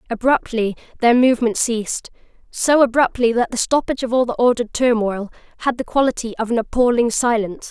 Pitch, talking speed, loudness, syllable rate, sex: 240 Hz, 150 wpm, -18 LUFS, 5.9 syllables/s, female